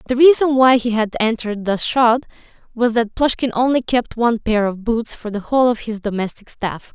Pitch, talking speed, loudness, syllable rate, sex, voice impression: 230 Hz, 205 wpm, -18 LUFS, 5.3 syllables/s, female, very feminine, very young, very thin, tensed, very powerful, very bright, hard, very clear, very fluent, very cute, slightly cool, slightly intellectual, very refreshing, slightly sincere, slightly calm, very friendly, very reassuring, very unique, slightly elegant, wild, slightly sweet, very lively, strict, very intense, slightly sharp, light